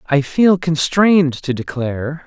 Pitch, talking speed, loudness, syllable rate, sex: 155 Hz, 135 wpm, -16 LUFS, 4.2 syllables/s, male